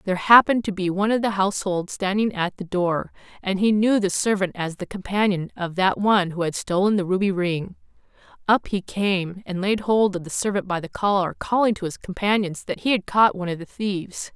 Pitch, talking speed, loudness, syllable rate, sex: 195 Hz, 220 wpm, -22 LUFS, 5.6 syllables/s, female